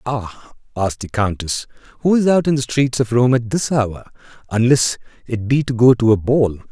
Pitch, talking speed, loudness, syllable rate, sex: 120 Hz, 205 wpm, -17 LUFS, 5.1 syllables/s, male